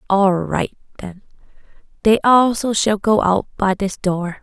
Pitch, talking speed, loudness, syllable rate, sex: 200 Hz, 150 wpm, -17 LUFS, 3.9 syllables/s, female